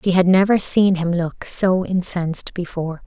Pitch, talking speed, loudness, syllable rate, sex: 180 Hz, 175 wpm, -19 LUFS, 4.7 syllables/s, female